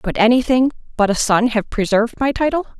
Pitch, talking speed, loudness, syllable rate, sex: 235 Hz, 215 wpm, -17 LUFS, 6.0 syllables/s, female